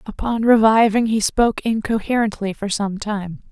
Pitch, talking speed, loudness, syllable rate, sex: 215 Hz, 135 wpm, -18 LUFS, 4.8 syllables/s, female